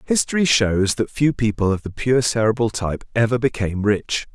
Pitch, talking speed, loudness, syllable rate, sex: 115 Hz, 180 wpm, -20 LUFS, 5.4 syllables/s, male